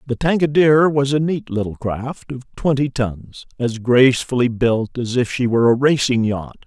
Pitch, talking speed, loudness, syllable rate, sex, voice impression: 125 Hz, 180 wpm, -18 LUFS, 4.9 syllables/s, male, masculine, adult-like, slightly thick, slightly muffled, slightly intellectual, slightly calm, slightly wild